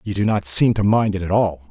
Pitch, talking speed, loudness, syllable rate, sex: 100 Hz, 315 wpm, -18 LUFS, 5.6 syllables/s, male